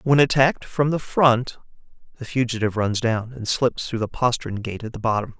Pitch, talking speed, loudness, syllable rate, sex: 120 Hz, 200 wpm, -22 LUFS, 5.4 syllables/s, male